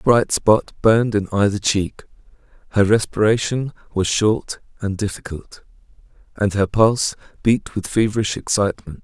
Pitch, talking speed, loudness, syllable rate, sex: 105 Hz, 135 wpm, -19 LUFS, 4.8 syllables/s, male